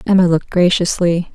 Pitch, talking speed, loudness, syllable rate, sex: 175 Hz, 135 wpm, -15 LUFS, 5.7 syllables/s, female